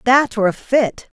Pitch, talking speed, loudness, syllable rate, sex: 235 Hz, 200 wpm, -17 LUFS, 4.0 syllables/s, female